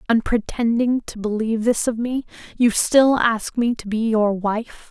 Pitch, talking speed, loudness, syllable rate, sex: 230 Hz, 185 wpm, -20 LUFS, 4.3 syllables/s, female